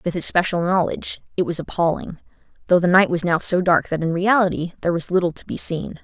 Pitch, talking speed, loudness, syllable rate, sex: 175 Hz, 220 wpm, -20 LUFS, 6.1 syllables/s, female